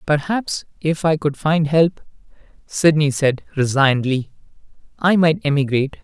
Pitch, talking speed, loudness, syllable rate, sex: 150 Hz, 120 wpm, -18 LUFS, 4.6 syllables/s, male